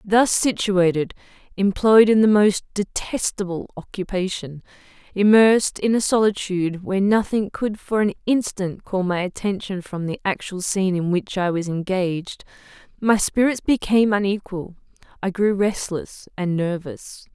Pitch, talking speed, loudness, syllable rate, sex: 195 Hz, 135 wpm, -21 LUFS, 4.7 syllables/s, female